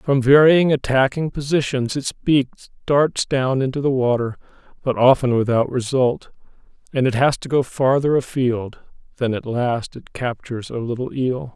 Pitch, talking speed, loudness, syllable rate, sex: 130 Hz, 155 wpm, -19 LUFS, 4.6 syllables/s, male